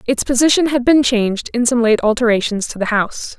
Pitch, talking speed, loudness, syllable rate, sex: 235 Hz, 215 wpm, -15 LUFS, 5.9 syllables/s, female